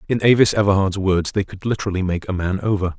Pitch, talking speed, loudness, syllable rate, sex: 95 Hz, 220 wpm, -19 LUFS, 6.5 syllables/s, male